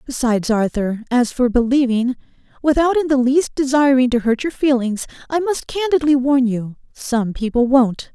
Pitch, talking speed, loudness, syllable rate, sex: 260 Hz, 145 wpm, -17 LUFS, 4.8 syllables/s, female